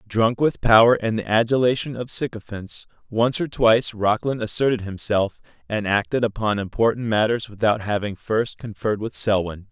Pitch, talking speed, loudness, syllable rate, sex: 110 Hz, 155 wpm, -21 LUFS, 5.1 syllables/s, male